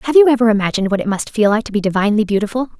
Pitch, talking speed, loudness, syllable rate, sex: 220 Hz, 280 wpm, -15 LUFS, 8.5 syllables/s, female